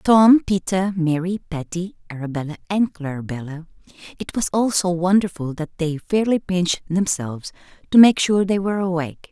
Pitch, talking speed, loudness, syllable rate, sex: 180 Hz, 155 wpm, -20 LUFS, 5.4 syllables/s, female